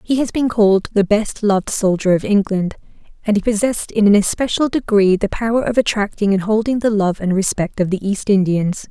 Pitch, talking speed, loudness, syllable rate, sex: 205 Hz, 210 wpm, -17 LUFS, 5.6 syllables/s, female